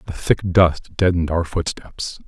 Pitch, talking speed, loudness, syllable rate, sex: 85 Hz, 160 wpm, -20 LUFS, 4.4 syllables/s, male